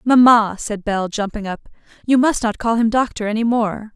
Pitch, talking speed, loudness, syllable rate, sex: 220 Hz, 195 wpm, -17 LUFS, 5.0 syllables/s, female